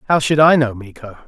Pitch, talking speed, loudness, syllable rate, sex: 130 Hz, 235 wpm, -14 LUFS, 5.9 syllables/s, male